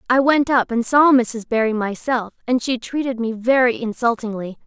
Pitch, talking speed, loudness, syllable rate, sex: 240 Hz, 180 wpm, -19 LUFS, 4.9 syllables/s, female